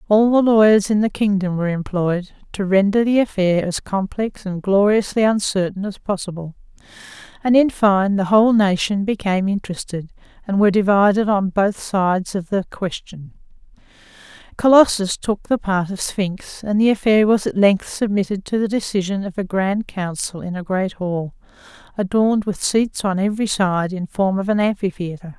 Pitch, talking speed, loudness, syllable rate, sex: 200 Hz, 170 wpm, -18 LUFS, 5.1 syllables/s, female